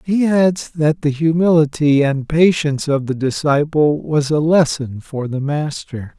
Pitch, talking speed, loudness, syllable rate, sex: 150 Hz, 155 wpm, -16 LUFS, 4.1 syllables/s, male